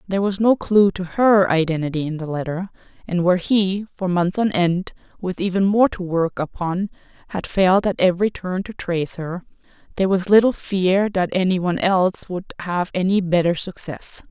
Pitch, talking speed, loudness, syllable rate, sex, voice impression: 185 Hz, 185 wpm, -20 LUFS, 5.2 syllables/s, female, feminine, adult-like, tensed, slightly hard, clear, slightly halting, intellectual, calm, slightly friendly, lively, kind